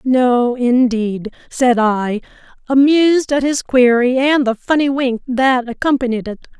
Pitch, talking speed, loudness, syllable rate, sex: 250 Hz, 135 wpm, -15 LUFS, 4.1 syllables/s, female